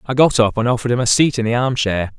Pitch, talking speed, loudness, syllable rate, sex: 120 Hz, 330 wpm, -16 LUFS, 6.8 syllables/s, male